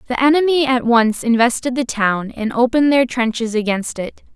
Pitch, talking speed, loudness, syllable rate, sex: 245 Hz, 180 wpm, -16 LUFS, 5.1 syllables/s, female